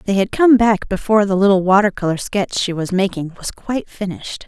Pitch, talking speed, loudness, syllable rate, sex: 200 Hz, 215 wpm, -17 LUFS, 5.8 syllables/s, female